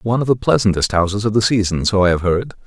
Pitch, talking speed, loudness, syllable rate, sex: 105 Hz, 270 wpm, -16 LUFS, 6.8 syllables/s, male